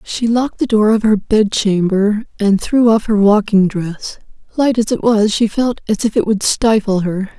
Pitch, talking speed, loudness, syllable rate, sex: 215 Hz, 205 wpm, -14 LUFS, 4.6 syllables/s, female